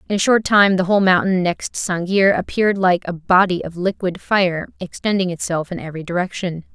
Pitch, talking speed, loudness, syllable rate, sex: 185 Hz, 180 wpm, -18 LUFS, 5.4 syllables/s, female